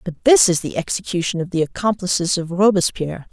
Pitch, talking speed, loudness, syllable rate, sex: 185 Hz, 180 wpm, -18 LUFS, 6.0 syllables/s, female